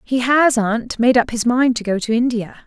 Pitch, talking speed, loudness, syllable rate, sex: 240 Hz, 250 wpm, -17 LUFS, 4.8 syllables/s, female